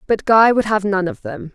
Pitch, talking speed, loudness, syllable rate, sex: 195 Hz, 270 wpm, -16 LUFS, 5.0 syllables/s, female